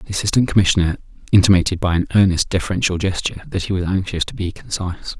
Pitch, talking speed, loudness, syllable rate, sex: 95 Hz, 185 wpm, -18 LUFS, 7.0 syllables/s, male